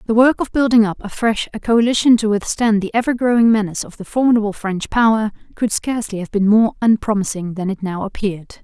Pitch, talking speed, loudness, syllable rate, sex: 215 Hz, 200 wpm, -17 LUFS, 6.2 syllables/s, female